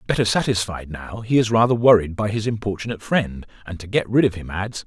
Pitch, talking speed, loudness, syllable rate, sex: 105 Hz, 220 wpm, -20 LUFS, 6.0 syllables/s, male